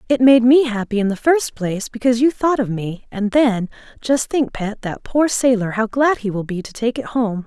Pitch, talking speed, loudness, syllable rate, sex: 230 Hz, 240 wpm, -18 LUFS, 5.1 syllables/s, female